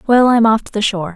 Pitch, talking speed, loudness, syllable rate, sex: 220 Hz, 310 wpm, -14 LUFS, 6.9 syllables/s, female